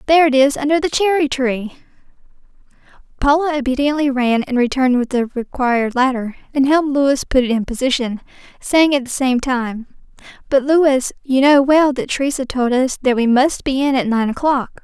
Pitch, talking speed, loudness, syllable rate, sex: 265 Hz, 180 wpm, -16 LUFS, 5.3 syllables/s, female